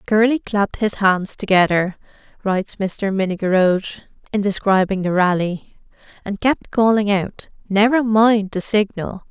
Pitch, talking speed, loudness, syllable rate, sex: 200 Hz, 130 wpm, -18 LUFS, 4.5 syllables/s, female